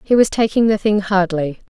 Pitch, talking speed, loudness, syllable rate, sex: 200 Hz, 210 wpm, -16 LUFS, 5.3 syllables/s, female